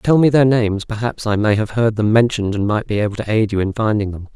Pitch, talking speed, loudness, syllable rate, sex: 110 Hz, 290 wpm, -17 LUFS, 6.3 syllables/s, male